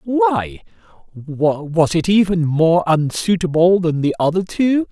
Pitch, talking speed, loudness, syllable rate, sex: 170 Hz, 120 wpm, -16 LUFS, 3.6 syllables/s, male